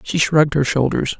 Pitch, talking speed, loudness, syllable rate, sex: 145 Hz, 200 wpm, -17 LUFS, 5.6 syllables/s, female